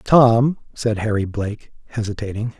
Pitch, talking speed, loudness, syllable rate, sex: 110 Hz, 115 wpm, -20 LUFS, 4.6 syllables/s, male